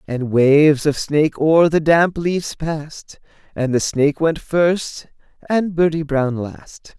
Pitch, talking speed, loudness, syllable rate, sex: 150 Hz, 155 wpm, -17 LUFS, 4.2 syllables/s, male